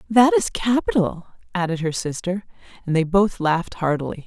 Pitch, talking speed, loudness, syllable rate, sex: 185 Hz, 155 wpm, -21 LUFS, 5.3 syllables/s, female